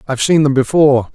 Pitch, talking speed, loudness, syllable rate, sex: 140 Hz, 265 wpm, -12 LUFS, 7.1 syllables/s, male